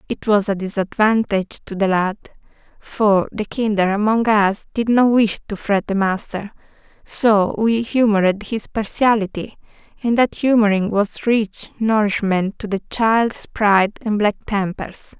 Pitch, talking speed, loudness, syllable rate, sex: 210 Hz, 145 wpm, -18 LUFS, 4.3 syllables/s, female